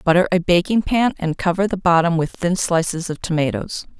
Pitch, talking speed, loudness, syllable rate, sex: 175 Hz, 195 wpm, -19 LUFS, 5.4 syllables/s, female